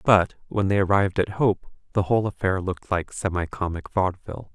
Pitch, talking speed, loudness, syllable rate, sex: 95 Hz, 185 wpm, -24 LUFS, 5.8 syllables/s, male